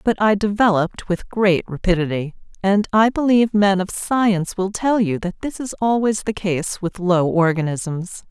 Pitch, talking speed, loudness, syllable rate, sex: 195 Hz, 175 wpm, -19 LUFS, 4.6 syllables/s, female